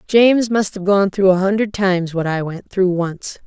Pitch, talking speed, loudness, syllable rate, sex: 190 Hz, 225 wpm, -17 LUFS, 4.9 syllables/s, female